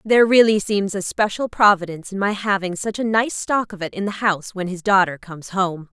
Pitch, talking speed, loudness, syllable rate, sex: 195 Hz, 230 wpm, -20 LUFS, 5.7 syllables/s, female